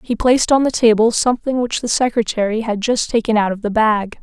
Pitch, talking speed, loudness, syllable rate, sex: 225 Hz, 225 wpm, -16 LUFS, 5.9 syllables/s, female